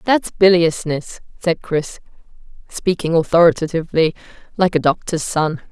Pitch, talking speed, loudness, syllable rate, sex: 165 Hz, 105 wpm, -17 LUFS, 4.7 syllables/s, female